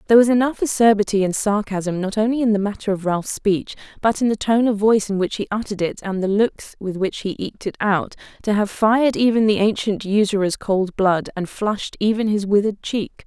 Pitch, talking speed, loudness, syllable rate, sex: 205 Hz, 220 wpm, -20 LUFS, 5.6 syllables/s, female